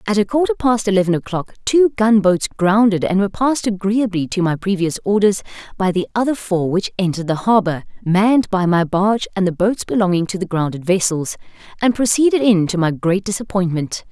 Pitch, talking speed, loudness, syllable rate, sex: 195 Hz, 190 wpm, -17 LUFS, 5.6 syllables/s, female